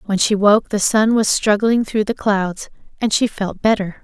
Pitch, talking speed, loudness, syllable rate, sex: 210 Hz, 210 wpm, -17 LUFS, 4.5 syllables/s, female